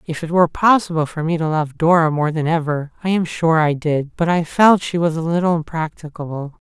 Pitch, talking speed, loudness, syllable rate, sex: 160 Hz, 225 wpm, -18 LUFS, 5.5 syllables/s, male